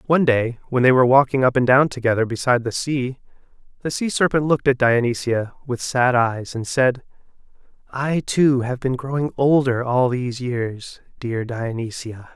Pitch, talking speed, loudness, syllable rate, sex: 125 Hz, 170 wpm, -20 LUFS, 5.0 syllables/s, male